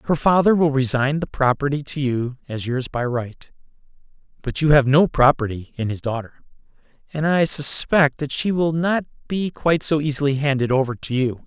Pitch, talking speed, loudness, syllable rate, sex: 140 Hz, 185 wpm, -20 LUFS, 5.1 syllables/s, male